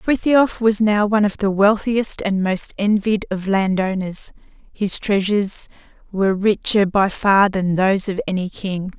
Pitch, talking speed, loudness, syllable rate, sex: 200 Hz, 160 wpm, -18 LUFS, 4.3 syllables/s, female